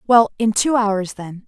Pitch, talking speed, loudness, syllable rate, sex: 215 Hz, 205 wpm, -18 LUFS, 4.0 syllables/s, female